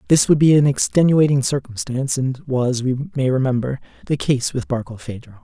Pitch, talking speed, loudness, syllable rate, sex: 135 Hz, 165 wpm, -18 LUFS, 5.4 syllables/s, male